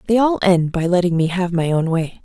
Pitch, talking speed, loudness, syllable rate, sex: 180 Hz, 270 wpm, -17 LUFS, 5.4 syllables/s, female